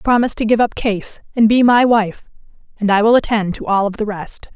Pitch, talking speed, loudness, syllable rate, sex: 220 Hz, 235 wpm, -15 LUFS, 5.5 syllables/s, female